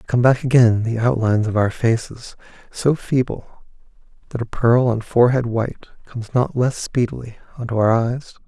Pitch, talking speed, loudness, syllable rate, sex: 120 Hz, 165 wpm, -19 LUFS, 5.2 syllables/s, male